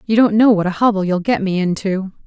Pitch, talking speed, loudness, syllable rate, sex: 200 Hz, 265 wpm, -16 LUFS, 5.8 syllables/s, female